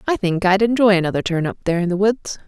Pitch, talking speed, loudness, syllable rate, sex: 195 Hz, 265 wpm, -18 LUFS, 6.9 syllables/s, female